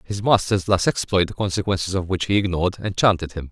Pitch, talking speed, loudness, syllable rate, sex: 95 Hz, 205 wpm, -21 LUFS, 6.2 syllables/s, male